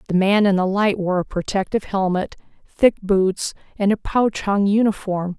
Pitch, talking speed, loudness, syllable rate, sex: 195 Hz, 180 wpm, -20 LUFS, 4.8 syllables/s, female